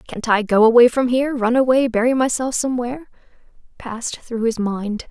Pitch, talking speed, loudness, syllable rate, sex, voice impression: 240 Hz, 175 wpm, -18 LUFS, 5.6 syllables/s, female, very feminine, slightly young, slightly soft, slightly fluent, slightly cute, kind